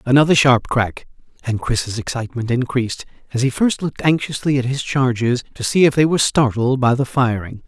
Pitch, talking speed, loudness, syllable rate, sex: 130 Hz, 190 wpm, -18 LUFS, 5.6 syllables/s, male